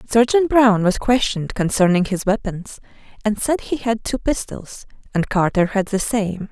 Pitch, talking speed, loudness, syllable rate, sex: 210 Hz, 165 wpm, -19 LUFS, 4.6 syllables/s, female